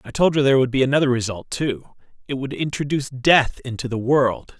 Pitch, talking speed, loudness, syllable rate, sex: 130 Hz, 195 wpm, -20 LUFS, 5.8 syllables/s, male